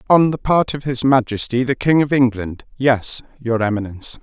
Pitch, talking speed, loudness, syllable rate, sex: 125 Hz, 185 wpm, -18 LUFS, 5.1 syllables/s, male